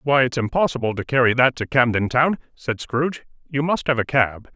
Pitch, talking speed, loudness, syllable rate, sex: 130 Hz, 210 wpm, -20 LUFS, 5.4 syllables/s, male